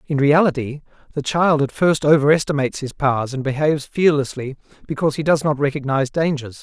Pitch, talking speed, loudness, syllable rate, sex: 145 Hz, 165 wpm, -18 LUFS, 6.2 syllables/s, male